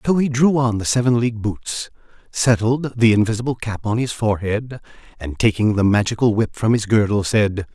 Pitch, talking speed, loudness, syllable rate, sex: 115 Hz, 185 wpm, -19 LUFS, 5.4 syllables/s, male